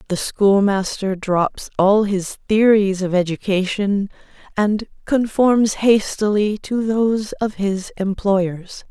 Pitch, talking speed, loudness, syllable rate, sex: 200 Hz, 110 wpm, -18 LUFS, 3.5 syllables/s, female